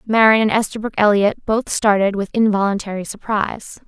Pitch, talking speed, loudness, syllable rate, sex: 210 Hz, 140 wpm, -17 LUFS, 5.6 syllables/s, female